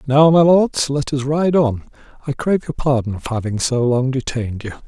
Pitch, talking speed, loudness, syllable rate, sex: 135 Hz, 210 wpm, -17 LUFS, 5.3 syllables/s, male